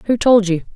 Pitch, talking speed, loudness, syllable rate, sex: 210 Hz, 235 wpm, -14 LUFS, 4.9 syllables/s, female